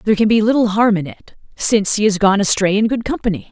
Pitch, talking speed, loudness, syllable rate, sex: 210 Hz, 255 wpm, -15 LUFS, 6.6 syllables/s, female